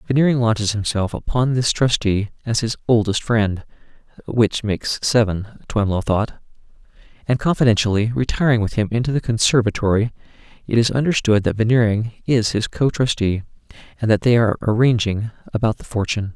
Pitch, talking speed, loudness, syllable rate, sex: 110 Hz, 145 wpm, -19 LUFS, 4.9 syllables/s, male